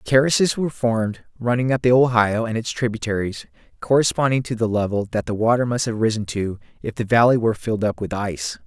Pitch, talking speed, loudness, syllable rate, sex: 115 Hz, 200 wpm, -20 LUFS, 6.2 syllables/s, male